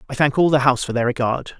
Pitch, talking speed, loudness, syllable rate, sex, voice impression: 135 Hz, 300 wpm, -18 LUFS, 7.1 syllables/s, male, masculine, very adult-like, slightly thick, sincere, slightly calm, slightly unique